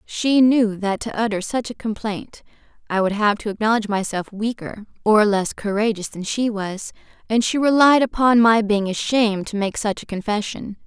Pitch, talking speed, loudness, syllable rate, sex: 215 Hz, 180 wpm, -20 LUFS, 5.0 syllables/s, female